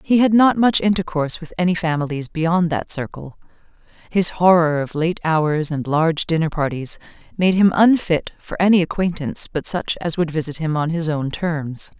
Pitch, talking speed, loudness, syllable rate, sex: 165 Hz, 180 wpm, -19 LUFS, 5.0 syllables/s, female